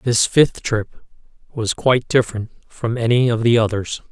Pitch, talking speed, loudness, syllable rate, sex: 115 Hz, 160 wpm, -18 LUFS, 5.0 syllables/s, male